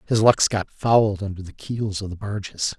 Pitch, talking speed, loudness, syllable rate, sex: 100 Hz, 215 wpm, -22 LUFS, 4.9 syllables/s, male